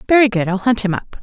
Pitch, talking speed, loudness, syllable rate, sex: 215 Hz, 295 wpm, -16 LUFS, 6.9 syllables/s, female